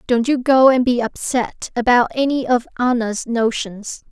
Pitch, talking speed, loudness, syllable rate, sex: 240 Hz, 160 wpm, -17 LUFS, 4.3 syllables/s, female